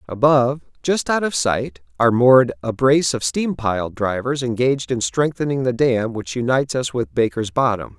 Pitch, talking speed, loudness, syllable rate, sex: 120 Hz, 180 wpm, -19 LUFS, 5.2 syllables/s, male